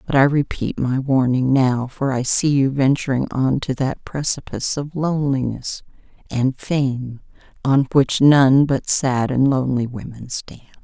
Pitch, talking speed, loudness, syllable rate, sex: 135 Hz, 155 wpm, -19 LUFS, 4.3 syllables/s, female